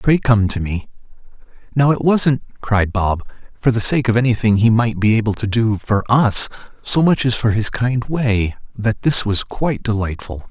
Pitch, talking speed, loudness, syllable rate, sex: 115 Hz, 195 wpm, -17 LUFS, 4.7 syllables/s, male